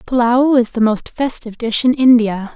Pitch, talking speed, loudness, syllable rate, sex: 240 Hz, 190 wpm, -15 LUFS, 4.8 syllables/s, female